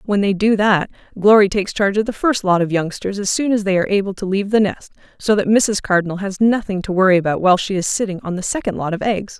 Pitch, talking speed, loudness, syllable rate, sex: 200 Hz, 270 wpm, -17 LUFS, 6.6 syllables/s, female